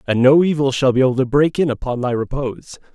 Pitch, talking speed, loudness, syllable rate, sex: 135 Hz, 245 wpm, -17 LUFS, 6.3 syllables/s, male